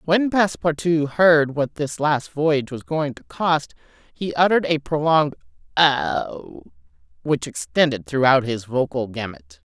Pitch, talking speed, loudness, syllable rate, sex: 150 Hz, 135 wpm, -20 LUFS, 4.3 syllables/s, female